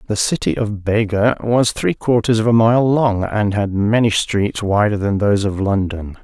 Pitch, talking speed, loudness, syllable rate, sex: 105 Hz, 190 wpm, -17 LUFS, 4.5 syllables/s, male